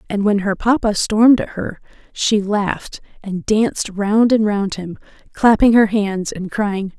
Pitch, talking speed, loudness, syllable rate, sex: 205 Hz, 170 wpm, -17 LUFS, 4.2 syllables/s, female